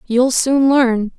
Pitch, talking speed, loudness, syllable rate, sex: 250 Hz, 150 wpm, -14 LUFS, 2.9 syllables/s, female